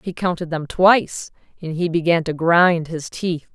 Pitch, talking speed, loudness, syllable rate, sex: 170 Hz, 185 wpm, -19 LUFS, 4.4 syllables/s, female